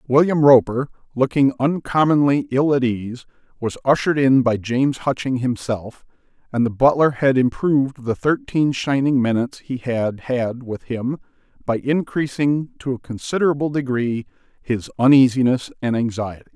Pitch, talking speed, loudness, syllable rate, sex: 130 Hz, 140 wpm, -19 LUFS, 4.8 syllables/s, male